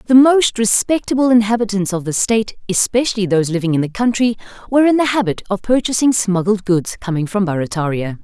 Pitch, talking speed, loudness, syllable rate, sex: 210 Hz, 175 wpm, -16 LUFS, 6.1 syllables/s, female